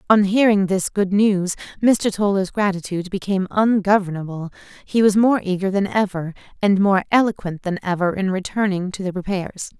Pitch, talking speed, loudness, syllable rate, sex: 195 Hz, 160 wpm, -19 LUFS, 5.3 syllables/s, female